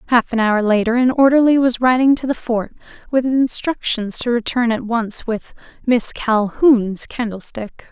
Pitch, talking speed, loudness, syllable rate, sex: 240 Hz, 160 wpm, -17 LUFS, 4.4 syllables/s, female